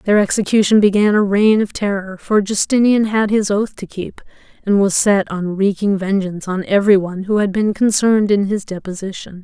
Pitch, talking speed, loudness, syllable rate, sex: 200 Hz, 190 wpm, -16 LUFS, 5.4 syllables/s, female